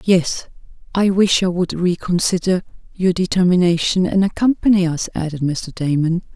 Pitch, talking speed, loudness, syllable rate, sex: 180 Hz, 130 wpm, -18 LUFS, 4.9 syllables/s, female